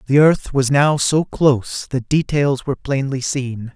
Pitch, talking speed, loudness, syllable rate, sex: 135 Hz, 175 wpm, -18 LUFS, 4.3 syllables/s, male